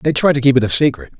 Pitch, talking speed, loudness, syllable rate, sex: 130 Hz, 350 wpm, -14 LUFS, 7.6 syllables/s, male